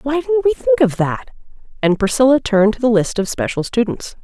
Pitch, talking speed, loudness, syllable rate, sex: 230 Hz, 210 wpm, -16 LUFS, 5.6 syllables/s, female